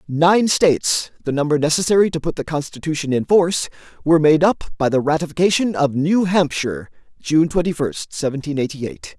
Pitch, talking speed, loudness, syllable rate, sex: 160 Hz, 170 wpm, -18 LUFS, 4.8 syllables/s, male